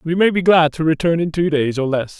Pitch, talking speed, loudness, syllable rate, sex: 160 Hz, 300 wpm, -17 LUFS, 5.6 syllables/s, male